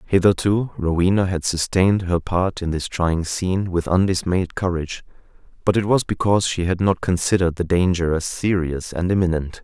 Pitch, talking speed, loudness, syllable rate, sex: 90 Hz, 170 wpm, -20 LUFS, 5.3 syllables/s, male